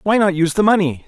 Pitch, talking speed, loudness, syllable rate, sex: 185 Hz, 280 wpm, -16 LUFS, 7.2 syllables/s, male